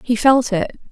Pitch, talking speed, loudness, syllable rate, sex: 235 Hz, 195 wpm, -16 LUFS, 4.1 syllables/s, female